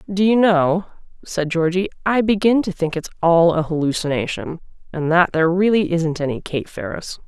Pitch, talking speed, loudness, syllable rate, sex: 175 Hz, 175 wpm, -19 LUFS, 5.1 syllables/s, female